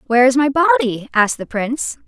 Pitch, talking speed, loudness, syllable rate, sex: 255 Hz, 205 wpm, -16 LUFS, 6.1 syllables/s, female